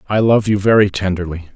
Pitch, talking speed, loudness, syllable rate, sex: 100 Hz, 190 wpm, -15 LUFS, 6.0 syllables/s, male